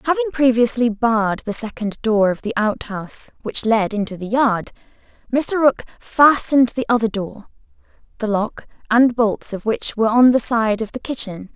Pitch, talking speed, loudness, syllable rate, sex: 230 Hz, 170 wpm, -18 LUFS, 4.9 syllables/s, female